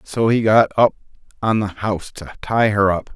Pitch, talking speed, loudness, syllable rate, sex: 105 Hz, 210 wpm, -18 LUFS, 5.0 syllables/s, male